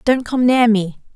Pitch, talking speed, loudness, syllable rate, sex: 230 Hz, 210 wpm, -15 LUFS, 4.3 syllables/s, female